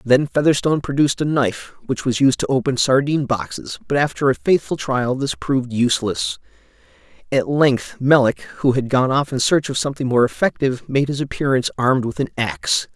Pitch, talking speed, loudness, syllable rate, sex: 135 Hz, 185 wpm, -19 LUFS, 5.7 syllables/s, male